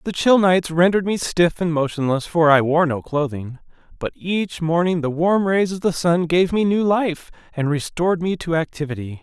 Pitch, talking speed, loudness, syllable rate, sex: 170 Hz, 200 wpm, -19 LUFS, 5.0 syllables/s, male